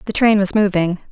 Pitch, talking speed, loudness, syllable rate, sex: 195 Hz, 215 wpm, -15 LUFS, 5.9 syllables/s, female